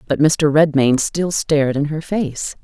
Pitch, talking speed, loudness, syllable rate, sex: 150 Hz, 180 wpm, -17 LUFS, 4.2 syllables/s, female